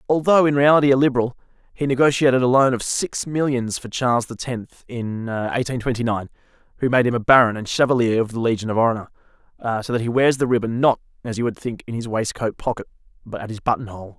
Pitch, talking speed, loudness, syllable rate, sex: 120 Hz, 220 wpm, -20 LUFS, 6.2 syllables/s, male